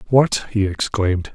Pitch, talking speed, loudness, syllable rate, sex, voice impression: 105 Hz, 135 wpm, -19 LUFS, 4.4 syllables/s, male, very masculine, old, very relaxed, weak, dark, slightly hard, very muffled, slightly fluent, slightly raspy, cool, very intellectual, sincere, very calm, very mature, friendly, reassuring, very unique, slightly elegant, wild, slightly sweet, slightly lively, very kind, very modest